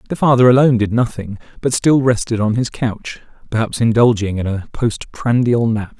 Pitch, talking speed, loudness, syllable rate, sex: 115 Hz, 170 wpm, -16 LUFS, 5.2 syllables/s, male